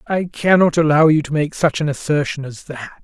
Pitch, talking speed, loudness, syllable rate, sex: 150 Hz, 220 wpm, -16 LUFS, 5.4 syllables/s, male